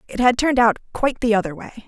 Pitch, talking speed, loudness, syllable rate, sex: 230 Hz, 255 wpm, -19 LUFS, 7.1 syllables/s, female